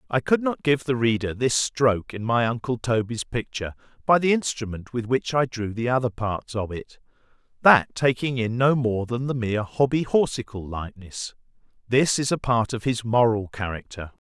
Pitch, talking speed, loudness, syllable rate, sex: 120 Hz, 175 wpm, -24 LUFS, 5.1 syllables/s, male